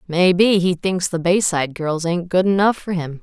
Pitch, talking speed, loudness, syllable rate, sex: 180 Hz, 205 wpm, -18 LUFS, 4.9 syllables/s, female